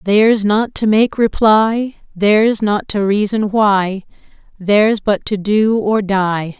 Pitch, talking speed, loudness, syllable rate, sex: 210 Hz, 145 wpm, -14 LUFS, 3.1 syllables/s, female